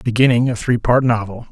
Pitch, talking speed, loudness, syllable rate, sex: 120 Hz, 200 wpm, -16 LUFS, 5.5 syllables/s, male